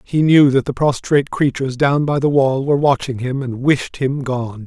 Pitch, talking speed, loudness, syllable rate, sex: 135 Hz, 220 wpm, -17 LUFS, 5.0 syllables/s, male